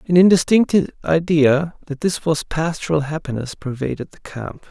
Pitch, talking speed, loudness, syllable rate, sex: 160 Hz, 140 wpm, -18 LUFS, 5.0 syllables/s, male